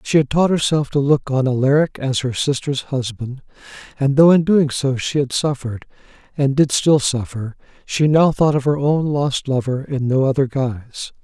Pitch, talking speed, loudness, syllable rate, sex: 135 Hz, 190 wpm, -18 LUFS, 4.8 syllables/s, male